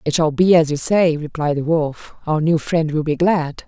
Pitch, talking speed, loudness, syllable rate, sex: 160 Hz, 245 wpm, -18 LUFS, 4.6 syllables/s, female